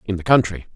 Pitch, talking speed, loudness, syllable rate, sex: 100 Hz, 240 wpm, -17 LUFS, 6.7 syllables/s, male